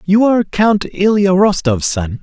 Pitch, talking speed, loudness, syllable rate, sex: 185 Hz, 160 wpm, -13 LUFS, 4.8 syllables/s, male